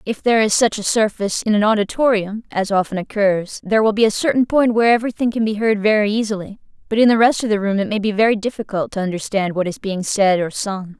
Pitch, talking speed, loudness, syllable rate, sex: 210 Hz, 245 wpm, -18 LUFS, 6.2 syllables/s, female